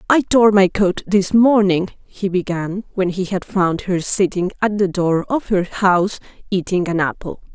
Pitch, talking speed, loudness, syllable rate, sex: 190 Hz, 185 wpm, -17 LUFS, 4.4 syllables/s, female